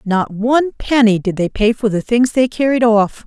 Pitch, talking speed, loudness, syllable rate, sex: 225 Hz, 220 wpm, -15 LUFS, 4.7 syllables/s, female